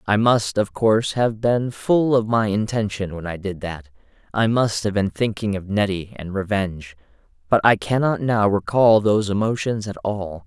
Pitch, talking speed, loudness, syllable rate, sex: 105 Hz, 185 wpm, -20 LUFS, 4.8 syllables/s, male